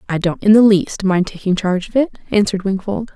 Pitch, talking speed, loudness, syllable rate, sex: 195 Hz, 230 wpm, -16 LUFS, 6.0 syllables/s, female